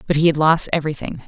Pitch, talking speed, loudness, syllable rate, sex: 155 Hz, 235 wpm, -18 LUFS, 7.5 syllables/s, female